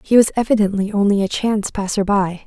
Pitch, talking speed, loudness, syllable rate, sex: 205 Hz, 195 wpm, -17 LUFS, 6.2 syllables/s, female